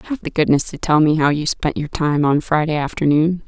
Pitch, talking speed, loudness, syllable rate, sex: 155 Hz, 240 wpm, -18 LUFS, 5.3 syllables/s, female